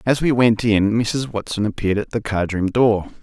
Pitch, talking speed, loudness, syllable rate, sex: 110 Hz, 225 wpm, -19 LUFS, 5.0 syllables/s, male